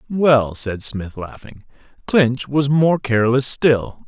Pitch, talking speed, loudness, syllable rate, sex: 125 Hz, 135 wpm, -17 LUFS, 3.5 syllables/s, male